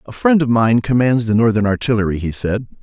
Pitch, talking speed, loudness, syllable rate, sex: 115 Hz, 210 wpm, -16 LUFS, 5.8 syllables/s, male